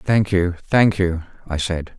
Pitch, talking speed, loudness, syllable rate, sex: 90 Hz, 180 wpm, -19 LUFS, 3.9 syllables/s, male